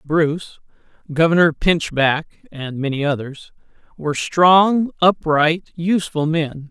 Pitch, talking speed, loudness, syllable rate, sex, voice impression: 160 Hz, 100 wpm, -18 LUFS, 3.8 syllables/s, male, masculine, adult-like, slightly cool, sincere, slightly unique